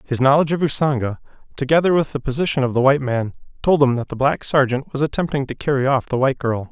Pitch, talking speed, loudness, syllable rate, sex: 135 Hz, 230 wpm, -19 LUFS, 6.7 syllables/s, male